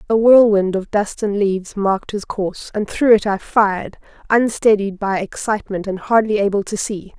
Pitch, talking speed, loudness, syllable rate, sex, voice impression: 205 Hz, 185 wpm, -17 LUFS, 5.1 syllables/s, female, very feminine, slightly young, adult-like, very thin, slightly tensed, slightly weak, slightly bright, soft, clear, fluent, cute, very intellectual, refreshing, very sincere, calm, friendly, reassuring, unique, elegant, slightly wild, sweet, slightly lively, kind, slightly intense, slightly sharp